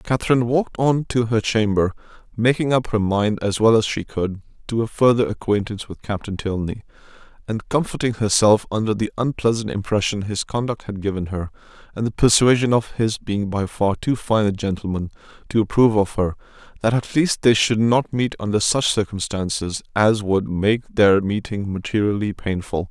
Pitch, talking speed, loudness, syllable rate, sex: 110 Hz, 175 wpm, -20 LUFS, 5.2 syllables/s, male